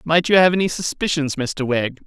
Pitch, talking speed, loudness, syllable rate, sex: 155 Hz, 205 wpm, -18 LUFS, 5.1 syllables/s, male